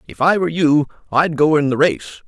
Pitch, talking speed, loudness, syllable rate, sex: 150 Hz, 240 wpm, -16 LUFS, 6.0 syllables/s, male